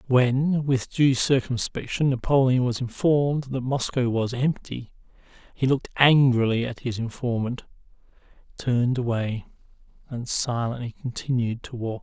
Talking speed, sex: 135 wpm, male